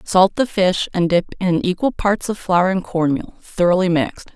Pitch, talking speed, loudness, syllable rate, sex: 185 Hz, 205 wpm, -18 LUFS, 4.8 syllables/s, female